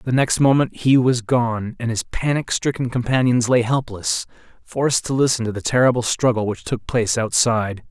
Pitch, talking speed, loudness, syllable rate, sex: 120 Hz, 180 wpm, -19 LUFS, 5.1 syllables/s, male